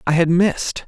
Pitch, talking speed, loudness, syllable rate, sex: 170 Hz, 205 wpm, -17 LUFS, 5.3 syllables/s, female